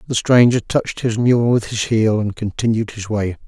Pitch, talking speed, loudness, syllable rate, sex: 110 Hz, 205 wpm, -17 LUFS, 5.0 syllables/s, male